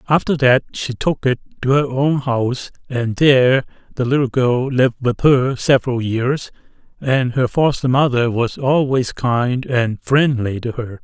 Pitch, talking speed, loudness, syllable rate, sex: 130 Hz, 165 wpm, -17 LUFS, 4.3 syllables/s, male